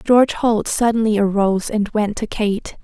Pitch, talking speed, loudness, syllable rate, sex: 215 Hz, 170 wpm, -18 LUFS, 4.8 syllables/s, female